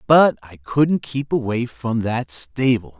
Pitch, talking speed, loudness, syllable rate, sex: 120 Hz, 160 wpm, -20 LUFS, 3.6 syllables/s, male